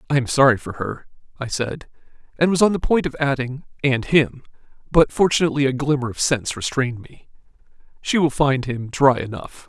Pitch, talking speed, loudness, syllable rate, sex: 135 Hz, 185 wpm, -20 LUFS, 4.2 syllables/s, male